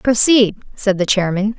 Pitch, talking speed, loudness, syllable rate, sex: 210 Hz, 150 wpm, -15 LUFS, 4.4 syllables/s, female